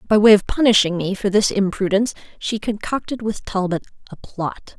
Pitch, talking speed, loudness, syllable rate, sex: 205 Hz, 175 wpm, -19 LUFS, 5.4 syllables/s, female